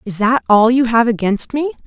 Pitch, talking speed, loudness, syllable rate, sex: 240 Hz, 225 wpm, -14 LUFS, 5.0 syllables/s, female